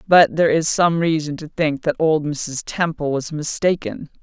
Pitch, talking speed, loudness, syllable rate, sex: 155 Hz, 185 wpm, -19 LUFS, 4.6 syllables/s, female